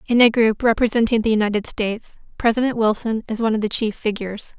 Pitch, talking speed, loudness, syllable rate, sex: 220 Hz, 195 wpm, -19 LUFS, 6.6 syllables/s, female